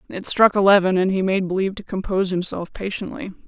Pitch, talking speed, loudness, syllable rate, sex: 190 Hz, 190 wpm, -20 LUFS, 6.3 syllables/s, female